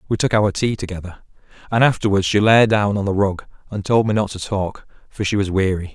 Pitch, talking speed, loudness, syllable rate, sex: 100 Hz, 230 wpm, -18 LUFS, 5.8 syllables/s, male